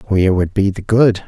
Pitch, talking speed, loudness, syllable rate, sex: 100 Hz, 235 wpm, -15 LUFS, 5.6 syllables/s, male